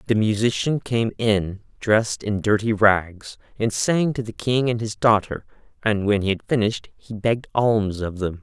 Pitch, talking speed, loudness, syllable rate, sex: 110 Hz, 185 wpm, -21 LUFS, 4.6 syllables/s, male